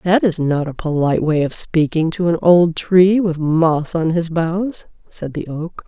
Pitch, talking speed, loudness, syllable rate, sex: 165 Hz, 205 wpm, -17 LUFS, 4.2 syllables/s, female